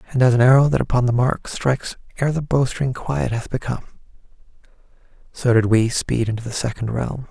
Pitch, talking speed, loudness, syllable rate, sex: 125 Hz, 190 wpm, -20 LUFS, 5.8 syllables/s, male